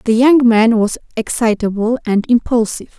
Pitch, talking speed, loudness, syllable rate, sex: 230 Hz, 140 wpm, -14 LUFS, 5.3 syllables/s, female